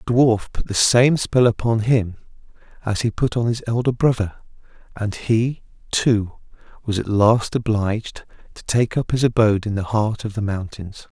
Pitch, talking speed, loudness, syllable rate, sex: 110 Hz, 180 wpm, -20 LUFS, 4.8 syllables/s, male